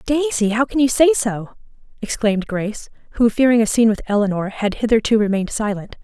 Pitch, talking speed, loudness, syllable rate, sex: 225 Hz, 180 wpm, -18 LUFS, 6.7 syllables/s, female